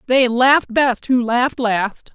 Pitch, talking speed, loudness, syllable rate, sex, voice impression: 245 Hz, 170 wpm, -16 LUFS, 3.1 syllables/s, female, feminine, middle-aged, tensed, clear, slightly halting, slightly intellectual, friendly, unique, lively, strict, intense